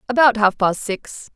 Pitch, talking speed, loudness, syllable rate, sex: 220 Hz, 175 wpm, -18 LUFS, 4.4 syllables/s, female